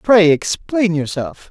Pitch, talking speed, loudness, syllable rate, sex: 180 Hz, 120 wpm, -16 LUFS, 3.6 syllables/s, male